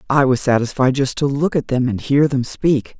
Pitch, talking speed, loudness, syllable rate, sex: 135 Hz, 240 wpm, -17 LUFS, 5.0 syllables/s, female